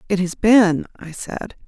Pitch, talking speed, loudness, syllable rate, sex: 190 Hz, 180 wpm, -18 LUFS, 3.8 syllables/s, female